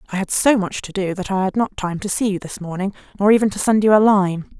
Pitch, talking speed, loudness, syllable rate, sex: 195 Hz, 300 wpm, -18 LUFS, 6.3 syllables/s, female